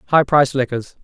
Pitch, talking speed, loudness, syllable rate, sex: 135 Hz, 175 wpm, -17 LUFS, 6.7 syllables/s, male